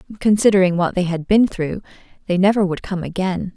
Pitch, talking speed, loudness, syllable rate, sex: 185 Hz, 185 wpm, -18 LUFS, 5.9 syllables/s, female